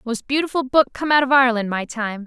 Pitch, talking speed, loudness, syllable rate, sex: 250 Hz, 240 wpm, -19 LUFS, 6.1 syllables/s, female